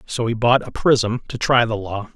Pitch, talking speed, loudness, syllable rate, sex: 115 Hz, 250 wpm, -19 LUFS, 4.7 syllables/s, male